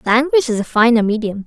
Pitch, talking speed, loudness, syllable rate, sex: 235 Hz, 205 wpm, -15 LUFS, 6.7 syllables/s, female